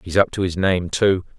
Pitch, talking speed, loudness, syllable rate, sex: 90 Hz, 260 wpm, -20 LUFS, 5.1 syllables/s, male